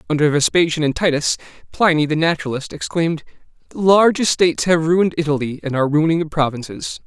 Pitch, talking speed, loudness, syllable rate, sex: 160 Hz, 155 wpm, -17 LUFS, 6.3 syllables/s, male